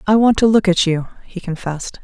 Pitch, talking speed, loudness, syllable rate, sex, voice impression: 190 Hz, 235 wpm, -16 LUFS, 5.7 syllables/s, female, very feminine, adult-like, calm, slightly sweet